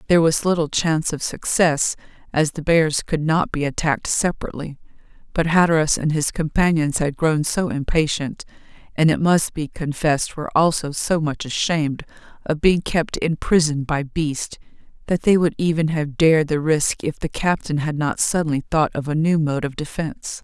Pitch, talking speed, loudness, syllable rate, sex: 155 Hz, 180 wpm, -20 LUFS, 5.1 syllables/s, female